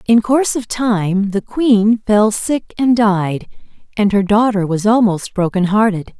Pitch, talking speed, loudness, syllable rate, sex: 210 Hz, 165 wpm, -15 LUFS, 4.0 syllables/s, female